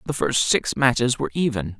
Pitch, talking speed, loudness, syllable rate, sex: 120 Hz, 200 wpm, -21 LUFS, 5.6 syllables/s, male